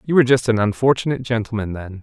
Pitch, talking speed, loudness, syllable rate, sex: 115 Hz, 205 wpm, -19 LUFS, 7.3 syllables/s, male